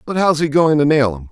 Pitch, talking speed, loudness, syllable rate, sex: 145 Hz, 320 wpm, -15 LUFS, 5.9 syllables/s, male